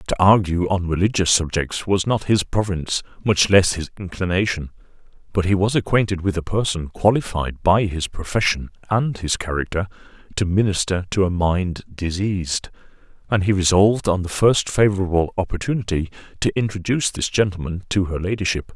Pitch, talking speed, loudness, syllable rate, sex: 95 Hz, 155 wpm, -20 LUFS, 5.4 syllables/s, male